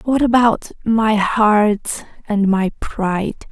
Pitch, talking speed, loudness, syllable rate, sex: 215 Hz, 120 wpm, -17 LUFS, 3.2 syllables/s, female